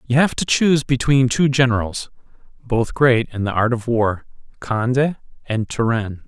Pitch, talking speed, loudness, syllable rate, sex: 125 Hz, 155 wpm, -19 LUFS, 5.1 syllables/s, male